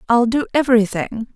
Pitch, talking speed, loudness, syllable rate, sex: 235 Hz, 135 wpm, -17 LUFS, 5.6 syllables/s, female